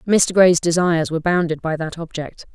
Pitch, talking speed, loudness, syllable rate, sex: 170 Hz, 190 wpm, -18 LUFS, 5.5 syllables/s, female